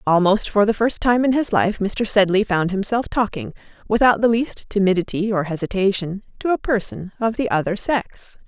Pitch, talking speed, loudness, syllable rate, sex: 205 Hz, 185 wpm, -19 LUFS, 5.1 syllables/s, female